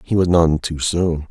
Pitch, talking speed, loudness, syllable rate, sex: 80 Hz, 230 wpm, -17 LUFS, 4.1 syllables/s, male